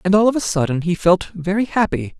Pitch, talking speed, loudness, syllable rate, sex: 185 Hz, 245 wpm, -18 LUFS, 5.8 syllables/s, male